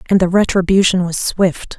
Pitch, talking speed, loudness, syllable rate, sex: 185 Hz, 170 wpm, -15 LUFS, 5.0 syllables/s, female